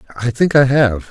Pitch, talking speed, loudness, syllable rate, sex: 130 Hz, 215 wpm, -14 LUFS, 5.4 syllables/s, male